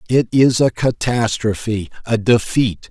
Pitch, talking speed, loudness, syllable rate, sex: 115 Hz, 125 wpm, -17 LUFS, 4.0 syllables/s, male